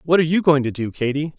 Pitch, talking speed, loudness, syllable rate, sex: 150 Hz, 305 wpm, -19 LUFS, 7.1 syllables/s, male